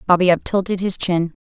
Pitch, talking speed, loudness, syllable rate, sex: 180 Hz, 170 wpm, -18 LUFS, 5.7 syllables/s, female